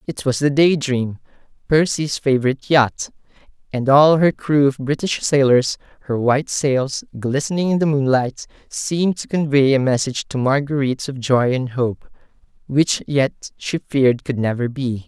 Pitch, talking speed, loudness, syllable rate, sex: 135 Hz, 160 wpm, -18 LUFS, 4.7 syllables/s, male